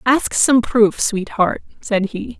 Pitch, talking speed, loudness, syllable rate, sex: 220 Hz, 150 wpm, -17 LUFS, 3.3 syllables/s, female